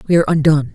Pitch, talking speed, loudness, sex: 155 Hz, 240 wpm, -14 LUFS, male